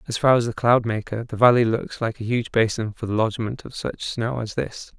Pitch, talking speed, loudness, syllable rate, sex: 115 Hz, 240 wpm, -22 LUFS, 5.5 syllables/s, male